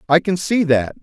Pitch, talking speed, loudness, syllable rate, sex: 165 Hz, 235 wpm, -17 LUFS, 4.9 syllables/s, male